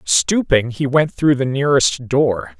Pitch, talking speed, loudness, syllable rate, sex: 135 Hz, 160 wpm, -16 LUFS, 4.0 syllables/s, male